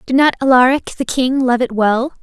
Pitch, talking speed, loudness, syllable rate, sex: 255 Hz, 215 wpm, -14 LUFS, 5.1 syllables/s, female